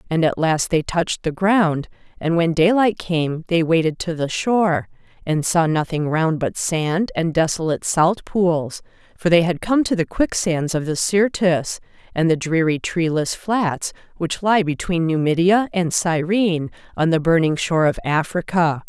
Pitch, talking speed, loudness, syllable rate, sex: 170 Hz, 170 wpm, -19 LUFS, 4.5 syllables/s, female